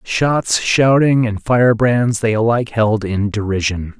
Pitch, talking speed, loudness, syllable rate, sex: 115 Hz, 135 wpm, -15 LUFS, 4.1 syllables/s, male